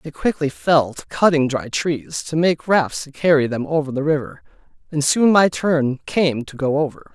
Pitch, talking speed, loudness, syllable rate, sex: 150 Hz, 200 wpm, -19 LUFS, 4.6 syllables/s, male